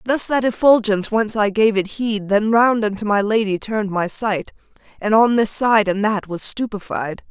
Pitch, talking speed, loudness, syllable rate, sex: 215 Hz, 195 wpm, -18 LUFS, 5.0 syllables/s, female